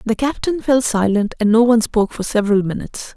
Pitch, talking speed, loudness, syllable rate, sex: 225 Hz, 210 wpm, -17 LUFS, 6.5 syllables/s, female